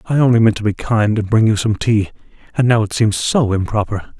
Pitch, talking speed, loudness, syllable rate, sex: 110 Hz, 245 wpm, -16 LUFS, 5.6 syllables/s, male